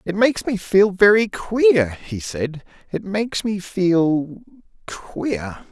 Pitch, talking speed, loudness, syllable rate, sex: 180 Hz, 125 wpm, -19 LUFS, 3.4 syllables/s, male